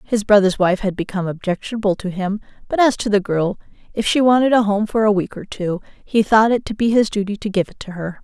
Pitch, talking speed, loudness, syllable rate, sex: 205 Hz, 255 wpm, -18 LUFS, 6.0 syllables/s, female